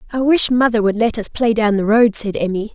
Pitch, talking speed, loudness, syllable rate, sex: 220 Hz, 265 wpm, -15 LUFS, 5.8 syllables/s, female